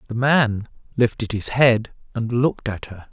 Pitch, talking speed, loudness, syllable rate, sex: 115 Hz, 175 wpm, -20 LUFS, 4.5 syllables/s, male